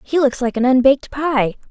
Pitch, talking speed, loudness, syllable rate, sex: 260 Hz, 210 wpm, -16 LUFS, 5.4 syllables/s, female